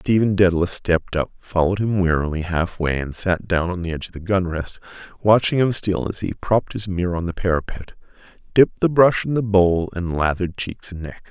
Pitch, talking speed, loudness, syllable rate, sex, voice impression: 95 Hz, 205 wpm, -20 LUFS, 5.8 syllables/s, male, very masculine, very adult-like, thick, cool, calm, wild